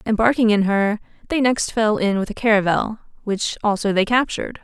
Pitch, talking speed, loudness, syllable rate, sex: 215 Hz, 180 wpm, -19 LUFS, 5.4 syllables/s, female